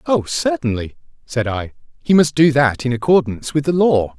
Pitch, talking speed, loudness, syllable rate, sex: 135 Hz, 185 wpm, -17 LUFS, 5.1 syllables/s, male